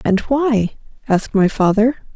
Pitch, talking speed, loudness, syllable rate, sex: 220 Hz, 140 wpm, -17 LUFS, 4.5 syllables/s, female